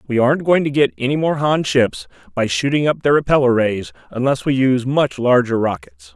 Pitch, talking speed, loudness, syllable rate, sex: 125 Hz, 205 wpm, -17 LUFS, 5.4 syllables/s, male